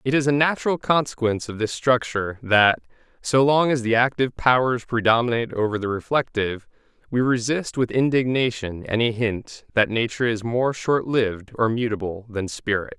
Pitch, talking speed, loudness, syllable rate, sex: 120 Hz, 155 wpm, -22 LUFS, 5.4 syllables/s, male